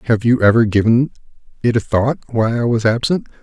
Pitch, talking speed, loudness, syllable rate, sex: 115 Hz, 195 wpm, -16 LUFS, 5.7 syllables/s, male